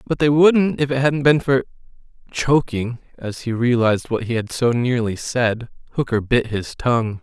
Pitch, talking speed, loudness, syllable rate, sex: 125 Hz, 185 wpm, -19 LUFS, 4.7 syllables/s, male